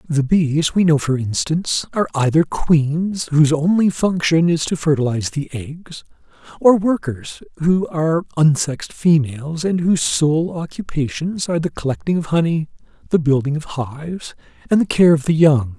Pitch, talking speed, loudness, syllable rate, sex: 155 Hz, 160 wpm, -18 LUFS, 4.9 syllables/s, male